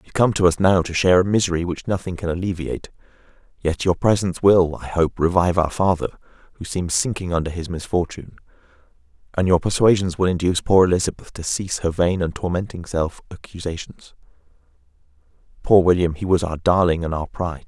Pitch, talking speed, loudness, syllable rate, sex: 90 Hz, 175 wpm, -20 LUFS, 6.1 syllables/s, male